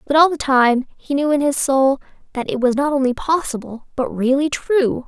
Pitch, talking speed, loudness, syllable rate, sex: 275 Hz, 215 wpm, -18 LUFS, 5.0 syllables/s, female